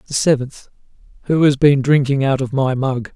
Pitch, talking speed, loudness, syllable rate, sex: 135 Hz, 190 wpm, -16 LUFS, 5.0 syllables/s, male